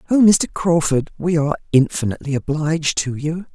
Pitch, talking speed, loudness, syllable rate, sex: 155 Hz, 150 wpm, -18 LUFS, 5.8 syllables/s, female